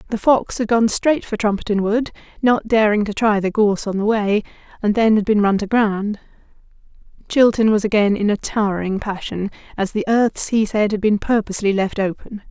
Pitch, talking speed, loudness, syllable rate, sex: 210 Hz, 195 wpm, -18 LUFS, 5.3 syllables/s, female